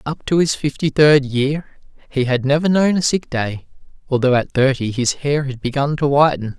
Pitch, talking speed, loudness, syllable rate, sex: 140 Hz, 200 wpm, -17 LUFS, 4.8 syllables/s, male